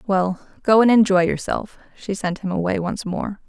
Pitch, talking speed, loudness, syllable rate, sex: 195 Hz, 190 wpm, -20 LUFS, 4.7 syllables/s, female